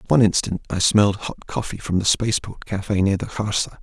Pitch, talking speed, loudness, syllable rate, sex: 100 Hz, 205 wpm, -21 LUFS, 5.9 syllables/s, male